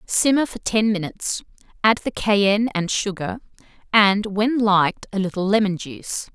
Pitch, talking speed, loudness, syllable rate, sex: 205 Hz, 150 wpm, -20 LUFS, 4.9 syllables/s, female